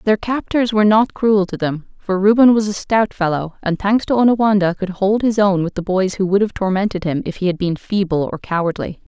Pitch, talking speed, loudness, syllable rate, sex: 195 Hz, 235 wpm, -17 LUFS, 5.5 syllables/s, female